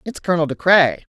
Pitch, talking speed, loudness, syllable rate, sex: 165 Hz, 210 wpm, -17 LUFS, 6.1 syllables/s, female